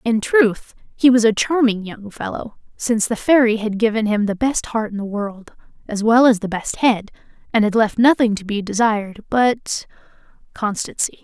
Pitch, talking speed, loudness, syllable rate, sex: 220 Hz, 180 wpm, -18 LUFS, 4.8 syllables/s, female